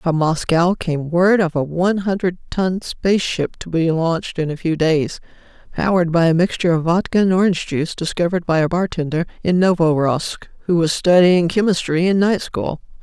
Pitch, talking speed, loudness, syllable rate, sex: 170 Hz, 180 wpm, -18 LUFS, 5.4 syllables/s, female